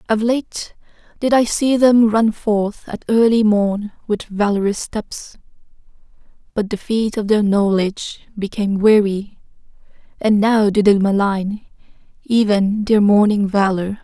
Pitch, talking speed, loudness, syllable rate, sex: 210 Hz, 135 wpm, -17 LUFS, 4.1 syllables/s, female